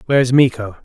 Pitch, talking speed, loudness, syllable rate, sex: 120 Hz, 215 wpm, -14 LUFS, 7.6 syllables/s, male